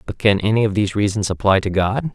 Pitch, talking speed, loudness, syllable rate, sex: 105 Hz, 250 wpm, -18 LUFS, 6.5 syllables/s, male